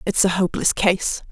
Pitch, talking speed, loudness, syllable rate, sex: 185 Hz, 185 wpm, -19 LUFS, 5.4 syllables/s, female